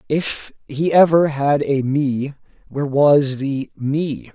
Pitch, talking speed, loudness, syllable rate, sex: 140 Hz, 140 wpm, -18 LUFS, 3.3 syllables/s, male